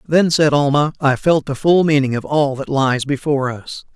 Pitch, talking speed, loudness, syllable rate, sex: 145 Hz, 210 wpm, -16 LUFS, 4.9 syllables/s, male